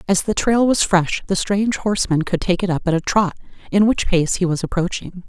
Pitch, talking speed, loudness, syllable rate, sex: 185 Hz, 225 wpm, -19 LUFS, 5.6 syllables/s, female